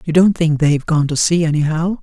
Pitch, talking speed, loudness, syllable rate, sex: 160 Hz, 235 wpm, -15 LUFS, 5.8 syllables/s, male